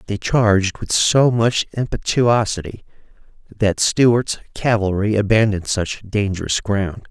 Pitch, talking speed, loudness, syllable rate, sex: 105 Hz, 110 wpm, -18 LUFS, 4.2 syllables/s, male